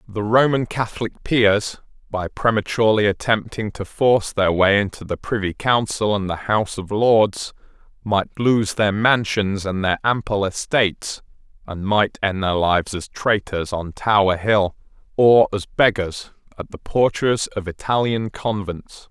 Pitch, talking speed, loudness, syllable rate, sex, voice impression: 105 Hz, 150 wpm, -20 LUFS, 4.3 syllables/s, male, masculine, adult-like, tensed, slightly bright, fluent, cool, friendly, wild, lively, slightly strict, slightly sharp